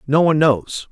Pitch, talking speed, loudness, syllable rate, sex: 145 Hz, 195 wpm, -16 LUFS, 5.3 syllables/s, male